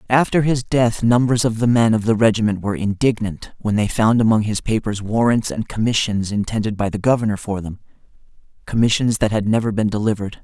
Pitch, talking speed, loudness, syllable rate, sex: 110 Hz, 190 wpm, -18 LUFS, 5.9 syllables/s, male